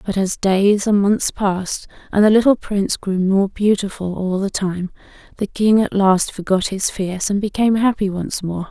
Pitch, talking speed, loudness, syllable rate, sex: 200 Hz, 195 wpm, -18 LUFS, 4.7 syllables/s, female